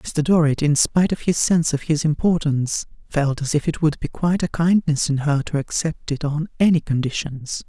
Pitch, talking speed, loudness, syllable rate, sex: 155 Hz, 210 wpm, -20 LUFS, 5.4 syllables/s, female